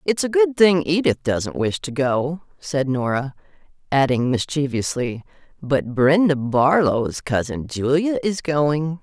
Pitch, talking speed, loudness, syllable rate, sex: 150 Hz, 135 wpm, -20 LUFS, 3.9 syllables/s, female